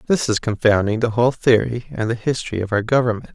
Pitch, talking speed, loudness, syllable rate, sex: 115 Hz, 215 wpm, -19 LUFS, 6.4 syllables/s, male